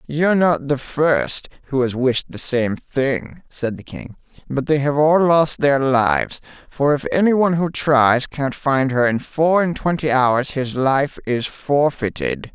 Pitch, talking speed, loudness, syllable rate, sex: 140 Hz, 180 wpm, -18 LUFS, 3.9 syllables/s, male